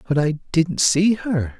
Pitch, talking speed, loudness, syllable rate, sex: 160 Hz, 190 wpm, -19 LUFS, 3.6 syllables/s, male